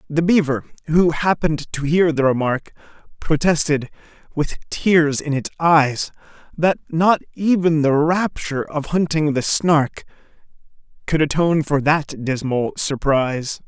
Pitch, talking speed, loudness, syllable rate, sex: 150 Hz, 125 wpm, -19 LUFS, 4.2 syllables/s, male